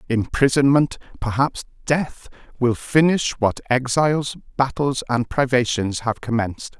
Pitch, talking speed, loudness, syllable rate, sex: 130 Hz, 105 wpm, -20 LUFS, 4.3 syllables/s, male